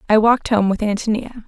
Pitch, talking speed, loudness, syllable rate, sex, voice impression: 220 Hz, 205 wpm, -18 LUFS, 6.7 syllables/s, female, very feminine, young, very thin, tensed, slightly weak, bright, slightly hard, clear, slightly fluent, very cute, intellectual, very refreshing, sincere, calm, very friendly, reassuring, unique, elegant, very sweet, slightly lively, very kind, slightly sharp, modest